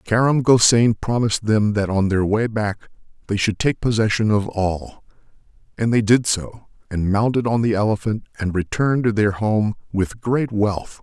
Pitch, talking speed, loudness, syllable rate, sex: 110 Hz, 175 wpm, -19 LUFS, 4.7 syllables/s, male